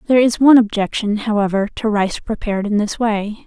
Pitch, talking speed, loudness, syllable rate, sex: 215 Hz, 190 wpm, -17 LUFS, 5.9 syllables/s, female